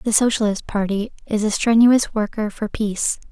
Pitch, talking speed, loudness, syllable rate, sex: 215 Hz, 165 wpm, -19 LUFS, 4.9 syllables/s, female